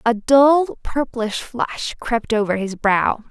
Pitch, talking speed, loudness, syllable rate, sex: 235 Hz, 145 wpm, -19 LUFS, 3.3 syllables/s, female